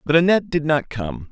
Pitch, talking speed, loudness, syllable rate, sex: 150 Hz, 230 wpm, -20 LUFS, 5.9 syllables/s, male